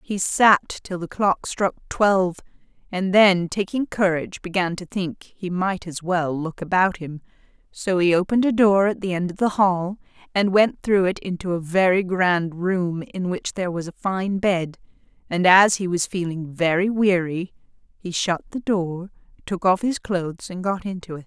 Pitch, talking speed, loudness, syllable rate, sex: 185 Hz, 190 wpm, -21 LUFS, 4.6 syllables/s, female